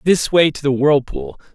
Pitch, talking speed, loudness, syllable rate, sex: 140 Hz, 195 wpm, -16 LUFS, 4.6 syllables/s, male